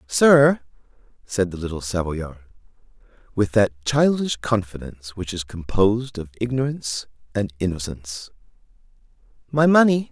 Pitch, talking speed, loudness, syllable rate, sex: 105 Hz, 105 wpm, -21 LUFS, 5.0 syllables/s, male